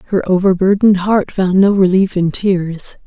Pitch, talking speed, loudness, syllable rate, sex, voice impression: 190 Hz, 155 wpm, -13 LUFS, 4.7 syllables/s, female, feminine, middle-aged, relaxed, slightly weak, soft, halting, intellectual, calm, slightly friendly, slightly reassuring, kind, modest